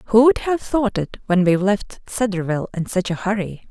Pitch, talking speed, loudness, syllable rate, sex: 205 Hz, 210 wpm, -20 LUFS, 4.8 syllables/s, female